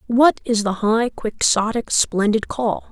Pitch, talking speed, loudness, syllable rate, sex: 225 Hz, 145 wpm, -19 LUFS, 3.7 syllables/s, female